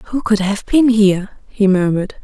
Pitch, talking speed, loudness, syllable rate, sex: 205 Hz, 190 wpm, -15 LUFS, 4.9 syllables/s, female